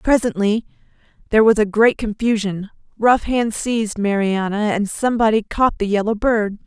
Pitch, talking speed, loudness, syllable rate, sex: 215 Hz, 145 wpm, -18 LUFS, 5.1 syllables/s, female